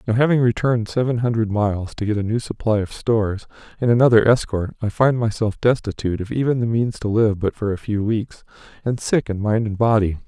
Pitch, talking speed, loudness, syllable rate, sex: 110 Hz, 215 wpm, -20 LUFS, 5.8 syllables/s, male